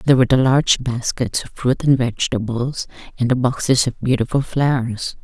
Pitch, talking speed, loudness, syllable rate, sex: 125 Hz, 170 wpm, -18 LUFS, 5.4 syllables/s, female